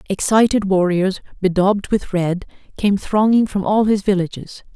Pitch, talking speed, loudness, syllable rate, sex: 195 Hz, 140 wpm, -17 LUFS, 4.8 syllables/s, female